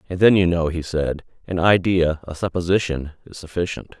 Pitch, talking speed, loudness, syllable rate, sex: 85 Hz, 180 wpm, -20 LUFS, 5.2 syllables/s, male